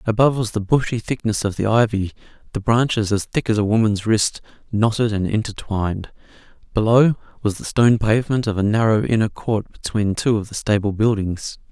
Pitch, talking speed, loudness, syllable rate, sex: 110 Hz, 180 wpm, -20 LUFS, 5.5 syllables/s, male